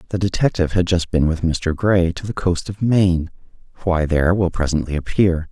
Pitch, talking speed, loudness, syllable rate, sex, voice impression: 90 Hz, 195 wpm, -19 LUFS, 5.5 syllables/s, male, masculine, adult-like, slightly thick, slightly dark, slightly fluent, sincere, calm